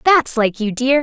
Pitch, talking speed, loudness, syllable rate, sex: 255 Hz, 235 wpm, -17 LUFS, 4.2 syllables/s, female